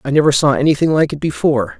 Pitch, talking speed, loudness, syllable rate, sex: 140 Hz, 235 wpm, -15 LUFS, 7.1 syllables/s, male